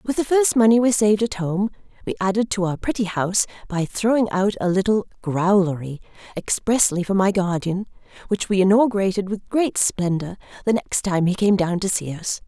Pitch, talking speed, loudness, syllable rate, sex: 200 Hz, 190 wpm, -20 LUFS, 5.3 syllables/s, female